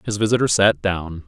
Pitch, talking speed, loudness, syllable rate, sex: 95 Hz, 190 wpm, -19 LUFS, 5.2 syllables/s, male